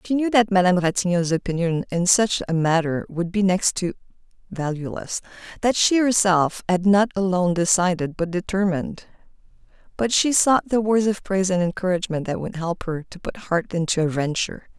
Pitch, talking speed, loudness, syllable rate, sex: 185 Hz, 175 wpm, -21 LUFS, 5.5 syllables/s, female